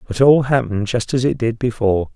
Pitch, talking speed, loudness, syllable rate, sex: 120 Hz, 225 wpm, -17 LUFS, 6.1 syllables/s, male